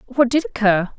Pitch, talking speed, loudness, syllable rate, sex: 245 Hz, 185 wpm, -18 LUFS, 4.9 syllables/s, female